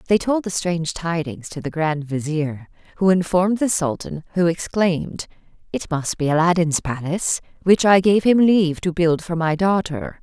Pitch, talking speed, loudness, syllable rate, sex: 170 Hz, 175 wpm, -20 LUFS, 4.9 syllables/s, female